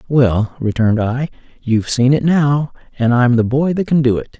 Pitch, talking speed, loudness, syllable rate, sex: 130 Hz, 205 wpm, -15 LUFS, 5.0 syllables/s, male